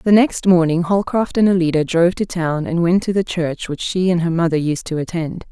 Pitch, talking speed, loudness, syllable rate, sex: 175 Hz, 240 wpm, -17 LUFS, 5.3 syllables/s, female